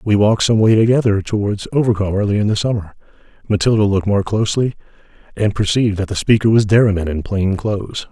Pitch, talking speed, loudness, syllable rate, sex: 105 Hz, 185 wpm, -16 LUFS, 6.6 syllables/s, male